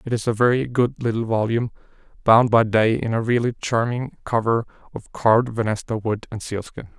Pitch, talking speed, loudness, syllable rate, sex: 115 Hz, 180 wpm, -21 LUFS, 5.5 syllables/s, male